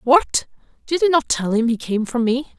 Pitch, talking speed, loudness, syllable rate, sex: 260 Hz, 230 wpm, -19 LUFS, 4.8 syllables/s, female